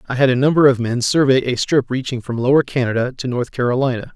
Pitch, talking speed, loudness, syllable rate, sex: 130 Hz, 230 wpm, -17 LUFS, 6.3 syllables/s, male